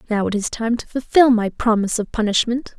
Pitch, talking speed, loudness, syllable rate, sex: 225 Hz, 215 wpm, -19 LUFS, 5.8 syllables/s, female